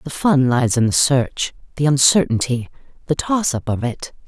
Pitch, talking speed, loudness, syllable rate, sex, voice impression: 135 Hz, 185 wpm, -18 LUFS, 4.6 syllables/s, female, feminine, middle-aged, relaxed, slightly dark, clear, slightly nasal, intellectual, calm, slightly friendly, reassuring, elegant, slightly sharp, modest